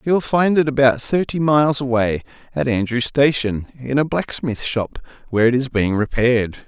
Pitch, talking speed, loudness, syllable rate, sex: 130 Hz, 180 wpm, -18 LUFS, 5.2 syllables/s, male